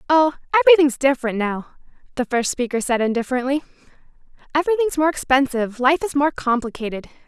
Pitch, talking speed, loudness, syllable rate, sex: 270 Hz, 130 wpm, -19 LUFS, 6.8 syllables/s, female